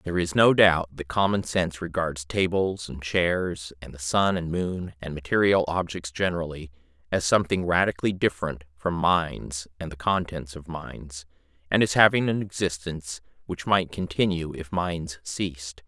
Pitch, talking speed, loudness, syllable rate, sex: 85 Hz, 160 wpm, -25 LUFS, 4.7 syllables/s, male